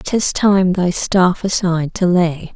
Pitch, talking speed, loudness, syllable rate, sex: 180 Hz, 165 wpm, -15 LUFS, 3.6 syllables/s, female